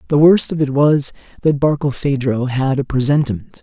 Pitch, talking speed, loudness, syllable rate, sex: 140 Hz, 165 wpm, -16 LUFS, 5.1 syllables/s, male